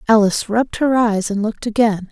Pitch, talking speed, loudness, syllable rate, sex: 220 Hz, 200 wpm, -17 LUFS, 6.2 syllables/s, female